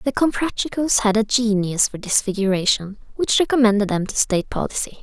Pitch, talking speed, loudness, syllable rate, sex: 220 Hz, 155 wpm, -19 LUFS, 5.6 syllables/s, female